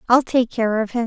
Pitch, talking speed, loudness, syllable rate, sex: 235 Hz, 280 wpm, -19 LUFS, 5.3 syllables/s, female